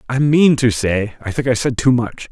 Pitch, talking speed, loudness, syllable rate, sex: 120 Hz, 260 wpm, -16 LUFS, 4.9 syllables/s, male